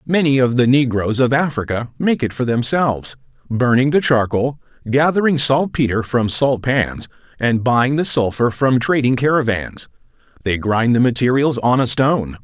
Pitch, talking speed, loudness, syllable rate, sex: 125 Hz, 150 wpm, -16 LUFS, 4.7 syllables/s, male